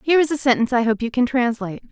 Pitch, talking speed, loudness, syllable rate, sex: 250 Hz, 280 wpm, -19 LUFS, 7.9 syllables/s, female